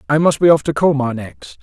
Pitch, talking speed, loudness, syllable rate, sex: 135 Hz, 260 wpm, -15 LUFS, 5.6 syllables/s, male